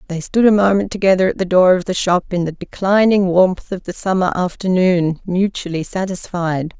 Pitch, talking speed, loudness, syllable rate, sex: 185 Hz, 185 wpm, -16 LUFS, 5.1 syllables/s, female